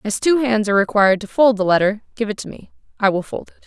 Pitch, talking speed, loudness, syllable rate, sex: 215 Hz, 280 wpm, -17 LUFS, 6.7 syllables/s, female